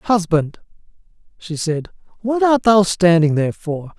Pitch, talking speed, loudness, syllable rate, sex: 185 Hz, 135 wpm, -17 LUFS, 4.3 syllables/s, male